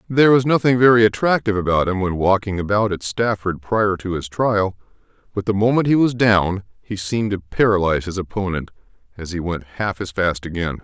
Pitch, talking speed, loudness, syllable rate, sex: 100 Hz, 195 wpm, -19 LUFS, 5.6 syllables/s, male